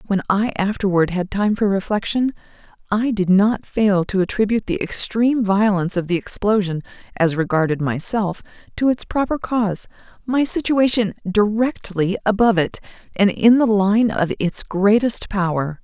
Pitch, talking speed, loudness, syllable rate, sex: 205 Hz, 145 wpm, -19 LUFS, 4.9 syllables/s, female